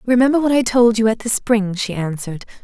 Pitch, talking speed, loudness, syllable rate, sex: 225 Hz, 230 wpm, -17 LUFS, 6.0 syllables/s, female